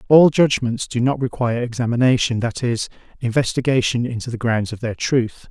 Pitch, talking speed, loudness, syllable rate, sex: 120 Hz, 165 wpm, -19 LUFS, 5.6 syllables/s, male